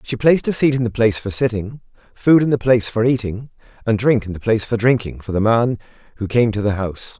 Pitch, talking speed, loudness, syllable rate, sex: 115 Hz, 250 wpm, -18 LUFS, 6.3 syllables/s, male